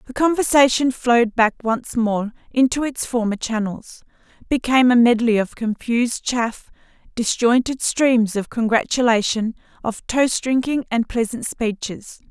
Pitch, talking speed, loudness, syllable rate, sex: 235 Hz, 125 wpm, -19 LUFS, 4.5 syllables/s, female